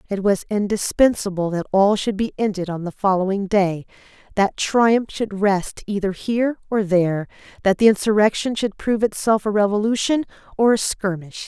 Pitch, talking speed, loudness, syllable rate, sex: 205 Hz, 160 wpm, -20 LUFS, 5.1 syllables/s, female